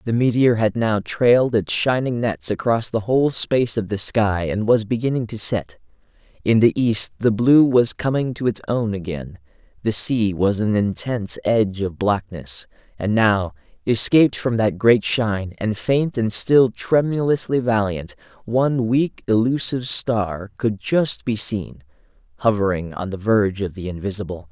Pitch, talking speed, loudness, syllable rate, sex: 110 Hz, 165 wpm, -20 LUFS, 4.6 syllables/s, male